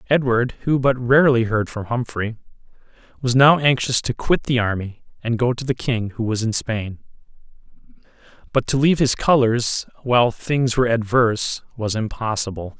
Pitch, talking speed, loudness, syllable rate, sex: 120 Hz, 160 wpm, -19 LUFS, 5.0 syllables/s, male